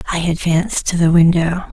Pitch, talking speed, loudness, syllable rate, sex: 170 Hz, 170 wpm, -15 LUFS, 5.3 syllables/s, female